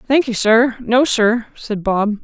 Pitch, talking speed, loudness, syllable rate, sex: 230 Hz, 160 wpm, -16 LUFS, 3.6 syllables/s, female